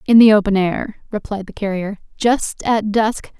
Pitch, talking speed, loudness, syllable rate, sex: 210 Hz, 175 wpm, -17 LUFS, 4.6 syllables/s, female